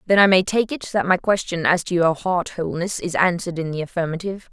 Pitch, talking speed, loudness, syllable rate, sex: 175 Hz, 240 wpm, -20 LUFS, 6.2 syllables/s, female